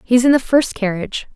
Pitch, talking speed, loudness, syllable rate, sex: 235 Hz, 220 wpm, -16 LUFS, 5.9 syllables/s, female